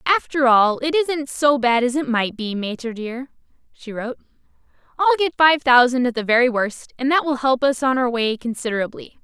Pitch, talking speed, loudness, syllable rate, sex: 255 Hz, 200 wpm, -19 LUFS, 5.2 syllables/s, female